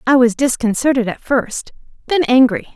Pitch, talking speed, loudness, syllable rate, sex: 250 Hz, 150 wpm, -15 LUFS, 5.0 syllables/s, female